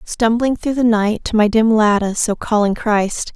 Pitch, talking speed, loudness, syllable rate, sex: 220 Hz, 195 wpm, -16 LUFS, 4.6 syllables/s, female